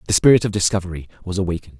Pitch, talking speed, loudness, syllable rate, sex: 95 Hz, 200 wpm, -19 LUFS, 8.8 syllables/s, male